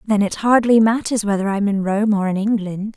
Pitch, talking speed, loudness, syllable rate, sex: 210 Hz, 225 wpm, -18 LUFS, 5.3 syllables/s, female